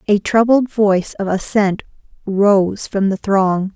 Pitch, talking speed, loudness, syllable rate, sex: 200 Hz, 145 wpm, -16 LUFS, 3.8 syllables/s, female